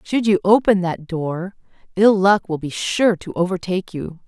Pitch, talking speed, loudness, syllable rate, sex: 185 Hz, 180 wpm, -18 LUFS, 4.7 syllables/s, female